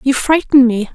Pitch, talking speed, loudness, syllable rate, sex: 260 Hz, 190 wpm, -12 LUFS, 4.9 syllables/s, female